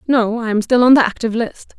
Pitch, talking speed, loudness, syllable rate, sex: 230 Hz, 270 wpm, -15 LUFS, 6.1 syllables/s, female